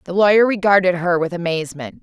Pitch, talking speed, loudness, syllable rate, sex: 180 Hz, 180 wpm, -16 LUFS, 6.4 syllables/s, female